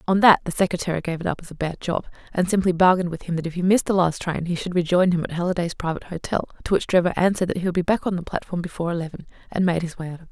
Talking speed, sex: 310 wpm, female